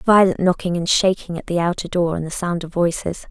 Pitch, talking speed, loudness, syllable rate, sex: 175 Hz, 235 wpm, -20 LUFS, 5.5 syllables/s, female